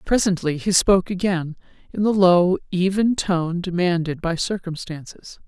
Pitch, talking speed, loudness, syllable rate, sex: 180 Hz, 130 wpm, -20 LUFS, 4.5 syllables/s, female